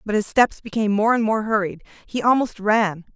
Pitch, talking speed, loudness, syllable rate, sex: 215 Hz, 210 wpm, -20 LUFS, 5.4 syllables/s, female